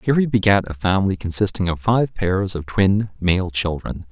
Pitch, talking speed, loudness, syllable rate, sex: 95 Hz, 190 wpm, -19 LUFS, 5.0 syllables/s, male